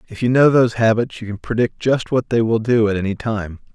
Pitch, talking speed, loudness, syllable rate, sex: 115 Hz, 255 wpm, -18 LUFS, 5.8 syllables/s, male